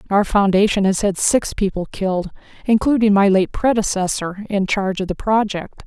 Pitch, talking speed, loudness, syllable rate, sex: 200 Hz, 155 wpm, -18 LUFS, 5.2 syllables/s, female